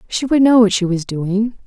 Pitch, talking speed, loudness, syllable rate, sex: 215 Hz, 255 wpm, -15 LUFS, 4.9 syllables/s, female